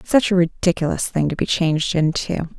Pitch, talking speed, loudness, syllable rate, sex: 170 Hz, 185 wpm, -19 LUFS, 5.5 syllables/s, female